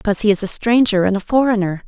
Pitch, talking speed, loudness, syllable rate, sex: 210 Hz, 255 wpm, -16 LUFS, 7.1 syllables/s, female